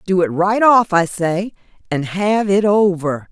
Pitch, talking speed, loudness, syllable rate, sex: 190 Hz, 180 wpm, -16 LUFS, 3.9 syllables/s, female